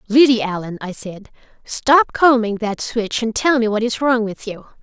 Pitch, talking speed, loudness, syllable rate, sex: 230 Hz, 200 wpm, -17 LUFS, 4.6 syllables/s, female